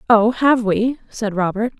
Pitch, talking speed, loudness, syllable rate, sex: 225 Hz, 165 wpm, -18 LUFS, 4.1 syllables/s, female